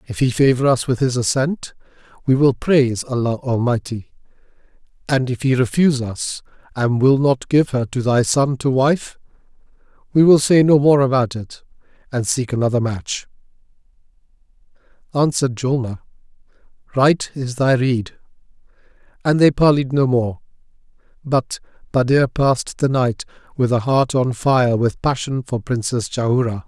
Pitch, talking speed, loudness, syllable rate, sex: 130 Hz, 145 wpm, -18 LUFS, 4.7 syllables/s, male